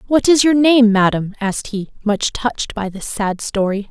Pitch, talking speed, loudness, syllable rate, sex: 220 Hz, 200 wpm, -16 LUFS, 4.8 syllables/s, female